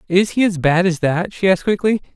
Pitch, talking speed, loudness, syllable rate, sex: 185 Hz, 250 wpm, -17 LUFS, 6.0 syllables/s, male